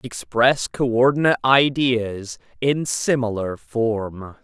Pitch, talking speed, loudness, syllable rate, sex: 120 Hz, 95 wpm, -20 LUFS, 3.5 syllables/s, male